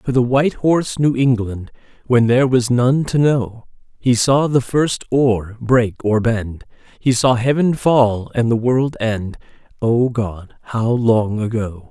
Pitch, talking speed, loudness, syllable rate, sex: 120 Hz, 165 wpm, -17 LUFS, 3.8 syllables/s, male